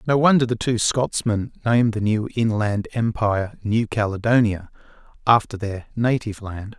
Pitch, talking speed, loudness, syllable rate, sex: 110 Hz, 135 wpm, -21 LUFS, 4.9 syllables/s, male